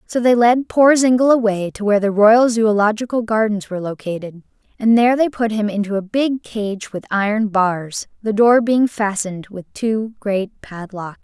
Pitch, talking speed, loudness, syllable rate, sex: 215 Hz, 180 wpm, -17 LUFS, 4.8 syllables/s, female